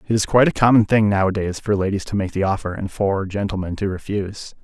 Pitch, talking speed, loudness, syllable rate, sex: 100 Hz, 235 wpm, -20 LUFS, 6.3 syllables/s, male